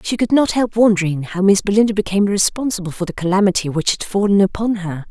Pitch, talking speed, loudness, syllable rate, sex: 200 Hz, 210 wpm, -17 LUFS, 6.4 syllables/s, female